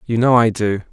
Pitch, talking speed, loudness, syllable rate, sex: 115 Hz, 260 wpm, -15 LUFS, 5.4 syllables/s, male